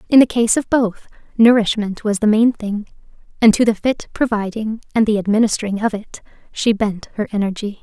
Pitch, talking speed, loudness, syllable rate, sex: 215 Hz, 185 wpm, -17 LUFS, 5.4 syllables/s, female